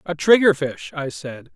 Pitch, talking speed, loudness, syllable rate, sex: 155 Hz, 155 wpm, -19 LUFS, 4.3 syllables/s, male